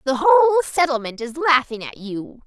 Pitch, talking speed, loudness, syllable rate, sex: 285 Hz, 170 wpm, -18 LUFS, 5.6 syllables/s, female